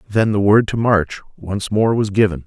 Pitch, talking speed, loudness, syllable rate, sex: 105 Hz, 220 wpm, -17 LUFS, 4.7 syllables/s, male